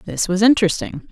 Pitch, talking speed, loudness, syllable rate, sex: 200 Hz, 160 wpm, -17 LUFS, 6.2 syllables/s, female